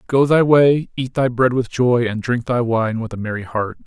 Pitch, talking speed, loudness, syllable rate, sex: 120 Hz, 250 wpm, -18 LUFS, 4.8 syllables/s, male